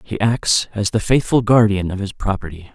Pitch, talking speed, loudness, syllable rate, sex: 105 Hz, 195 wpm, -18 LUFS, 5.0 syllables/s, male